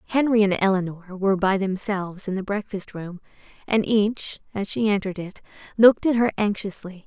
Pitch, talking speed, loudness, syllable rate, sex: 200 Hz, 170 wpm, -22 LUFS, 5.5 syllables/s, female